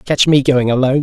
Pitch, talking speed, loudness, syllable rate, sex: 135 Hz, 235 wpm, -13 LUFS, 5.8 syllables/s, male